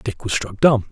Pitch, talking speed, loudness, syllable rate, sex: 110 Hz, 260 wpm, -19 LUFS, 4.8 syllables/s, male